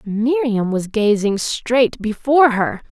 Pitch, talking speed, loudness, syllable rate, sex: 230 Hz, 120 wpm, -17 LUFS, 3.6 syllables/s, female